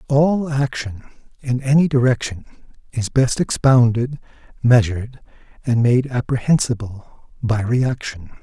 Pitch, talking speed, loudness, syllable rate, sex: 125 Hz, 100 wpm, -18 LUFS, 4.4 syllables/s, male